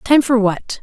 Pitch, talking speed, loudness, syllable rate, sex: 235 Hz, 220 wpm, -15 LUFS, 3.8 syllables/s, female